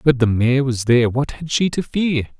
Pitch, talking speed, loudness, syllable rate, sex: 130 Hz, 250 wpm, -18 LUFS, 5.0 syllables/s, male